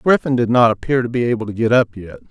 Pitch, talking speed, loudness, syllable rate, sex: 115 Hz, 310 wpm, -17 LUFS, 7.2 syllables/s, male